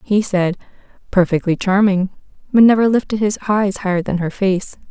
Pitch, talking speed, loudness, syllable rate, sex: 195 Hz, 160 wpm, -16 LUFS, 5.1 syllables/s, female